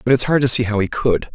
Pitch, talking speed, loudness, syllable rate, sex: 115 Hz, 355 wpm, -17 LUFS, 6.7 syllables/s, male